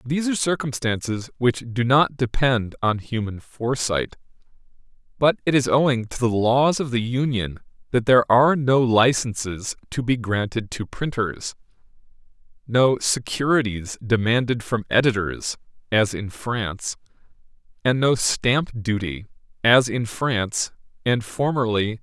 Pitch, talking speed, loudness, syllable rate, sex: 120 Hz, 135 wpm, -22 LUFS, 4.6 syllables/s, male